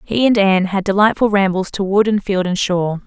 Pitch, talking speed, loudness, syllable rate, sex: 195 Hz, 235 wpm, -16 LUFS, 5.8 syllables/s, female